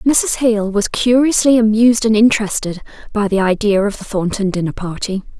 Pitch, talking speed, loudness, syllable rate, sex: 215 Hz, 165 wpm, -15 LUFS, 5.3 syllables/s, female